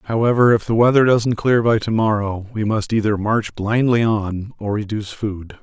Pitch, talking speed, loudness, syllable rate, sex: 110 Hz, 190 wpm, -18 LUFS, 4.8 syllables/s, male